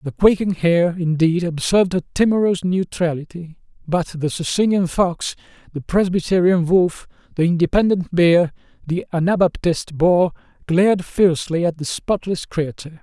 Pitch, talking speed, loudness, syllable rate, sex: 175 Hz, 125 wpm, -18 LUFS, 4.8 syllables/s, male